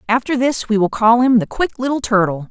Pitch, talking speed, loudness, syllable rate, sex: 230 Hz, 240 wpm, -16 LUFS, 5.5 syllables/s, female